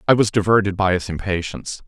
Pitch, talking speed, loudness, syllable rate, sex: 100 Hz, 190 wpm, -19 LUFS, 6.5 syllables/s, male